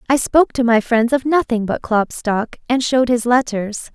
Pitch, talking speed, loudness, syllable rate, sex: 240 Hz, 200 wpm, -17 LUFS, 4.9 syllables/s, female